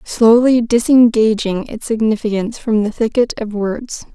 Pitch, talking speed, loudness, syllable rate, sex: 225 Hz, 130 wpm, -15 LUFS, 4.6 syllables/s, female